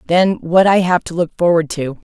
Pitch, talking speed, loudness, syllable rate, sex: 170 Hz, 225 wpm, -15 LUFS, 4.8 syllables/s, female